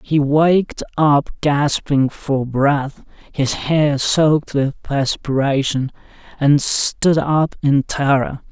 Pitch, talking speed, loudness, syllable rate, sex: 145 Hz, 115 wpm, -17 LUFS, 3.1 syllables/s, male